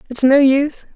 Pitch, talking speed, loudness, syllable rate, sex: 270 Hz, 190 wpm, -14 LUFS, 5.7 syllables/s, female